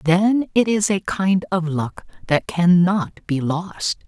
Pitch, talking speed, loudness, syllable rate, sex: 180 Hz, 160 wpm, -20 LUFS, 3.4 syllables/s, female